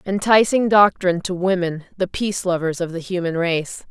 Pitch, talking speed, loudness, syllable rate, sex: 180 Hz, 170 wpm, -19 LUFS, 5.2 syllables/s, female